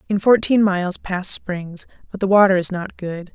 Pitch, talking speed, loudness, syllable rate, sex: 190 Hz, 200 wpm, -18 LUFS, 4.8 syllables/s, female